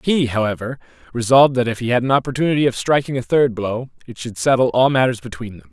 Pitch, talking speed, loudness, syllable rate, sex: 125 Hz, 220 wpm, -18 LUFS, 6.5 syllables/s, male